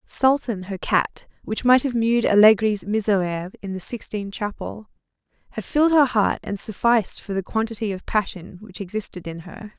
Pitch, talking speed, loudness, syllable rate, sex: 210 Hz, 170 wpm, -22 LUFS, 5.3 syllables/s, female